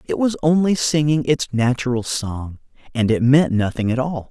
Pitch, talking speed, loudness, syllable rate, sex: 135 Hz, 180 wpm, -19 LUFS, 4.8 syllables/s, male